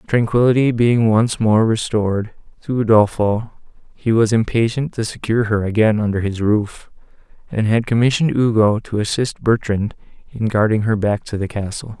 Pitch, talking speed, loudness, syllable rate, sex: 110 Hz, 155 wpm, -17 LUFS, 5.1 syllables/s, male